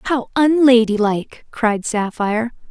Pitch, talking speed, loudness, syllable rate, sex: 230 Hz, 90 wpm, -17 LUFS, 4.1 syllables/s, female